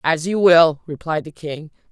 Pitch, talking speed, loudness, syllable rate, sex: 160 Hz, 190 wpm, -16 LUFS, 4.4 syllables/s, female